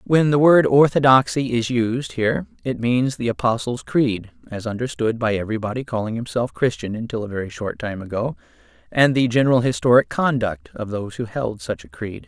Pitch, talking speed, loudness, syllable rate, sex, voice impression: 120 Hz, 180 wpm, -20 LUFS, 5.4 syllables/s, male, very masculine, very middle-aged, very thick, tensed, slightly powerful, bright, soft, clear, fluent, raspy, cool, very intellectual, refreshing, sincere, calm, mature, very friendly, very reassuring, unique, elegant, sweet, lively, kind, slightly modest